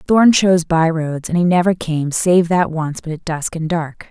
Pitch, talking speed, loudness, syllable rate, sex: 170 Hz, 235 wpm, -16 LUFS, 4.4 syllables/s, female